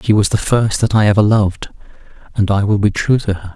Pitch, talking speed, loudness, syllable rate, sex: 105 Hz, 255 wpm, -15 LUFS, 6.1 syllables/s, male